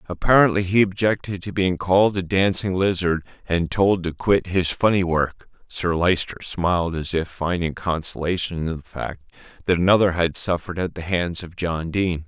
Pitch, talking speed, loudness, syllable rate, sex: 90 Hz, 175 wpm, -21 LUFS, 5.0 syllables/s, male